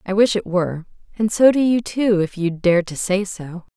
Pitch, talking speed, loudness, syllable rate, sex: 195 Hz, 240 wpm, -19 LUFS, 4.9 syllables/s, female